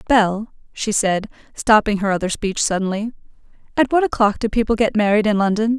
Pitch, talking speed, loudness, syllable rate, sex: 215 Hz, 175 wpm, -18 LUFS, 5.6 syllables/s, female